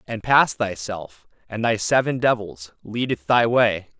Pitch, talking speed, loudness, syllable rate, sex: 105 Hz, 150 wpm, -21 LUFS, 4.0 syllables/s, male